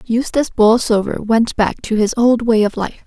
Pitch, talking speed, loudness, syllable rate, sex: 225 Hz, 195 wpm, -15 LUFS, 4.8 syllables/s, female